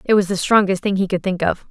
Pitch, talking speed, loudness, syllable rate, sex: 195 Hz, 315 wpm, -18 LUFS, 6.3 syllables/s, female